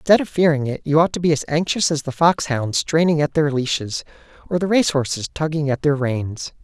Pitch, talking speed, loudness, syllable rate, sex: 150 Hz, 235 wpm, -19 LUFS, 5.6 syllables/s, male